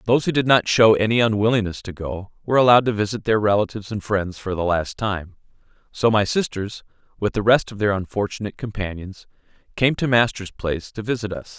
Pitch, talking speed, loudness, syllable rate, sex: 105 Hz, 195 wpm, -21 LUFS, 6.0 syllables/s, male